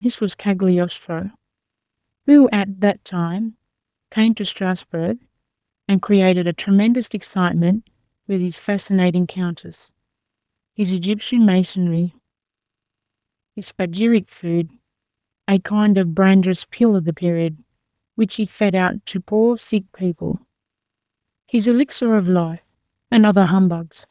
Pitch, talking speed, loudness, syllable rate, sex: 195 Hz, 120 wpm, -18 LUFS, 4.1 syllables/s, female